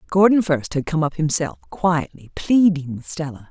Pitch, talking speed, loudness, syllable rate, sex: 155 Hz, 170 wpm, -20 LUFS, 4.8 syllables/s, female